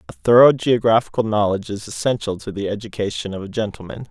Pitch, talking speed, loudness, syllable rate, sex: 105 Hz, 175 wpm, -19 LUFS, 6.3 syllables/s, male